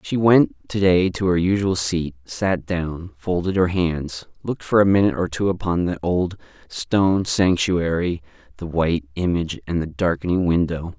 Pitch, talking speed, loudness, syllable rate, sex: 85 Hz, 170 wpm, -21 LUFS, 4.7 syllables/s, male